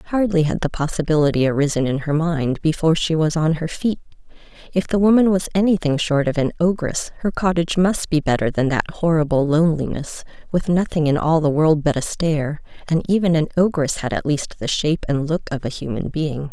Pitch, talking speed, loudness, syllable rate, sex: 160 Hz, 205 wpm, -19 LUFS, 5.7 syllables/s, female